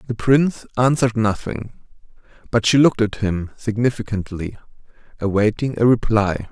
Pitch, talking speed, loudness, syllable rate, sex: 110 Hz, 120 wpm, -19 LUFS, 5.2 syllables/s, male